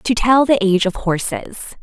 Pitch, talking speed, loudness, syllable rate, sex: 210 Hz, 195 wpm, -16 LUFS, 5.2 syllables/s, female